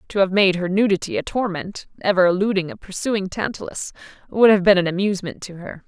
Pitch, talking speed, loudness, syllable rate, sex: 190 Hz, 195 wpm, -20 LUFS, 6.0 syllables/s, female